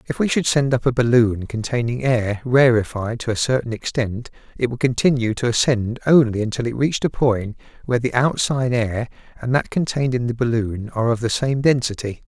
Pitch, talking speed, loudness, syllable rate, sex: 120 Hz, 195 wpm, -20 LUFS, 5.6 syllables/s, male